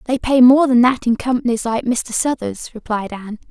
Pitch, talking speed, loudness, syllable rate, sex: 240 Hz, 205 wpm, -16 LUFS, 5.3 syllables/s, female